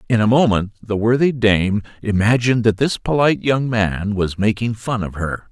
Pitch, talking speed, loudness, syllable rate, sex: 110 Hz, 185 wpm, -18 LUFS, 4.9 syllables/s, male